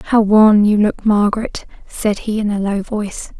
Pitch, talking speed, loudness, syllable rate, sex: 210 Hz, 195 wpm, -15 LUFS, 4.8 syllables/s, female